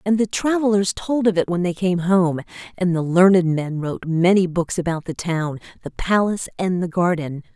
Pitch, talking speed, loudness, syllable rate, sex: 180 Hz, 200 wpm, -20 LUFS, 5.1 syllables/s, female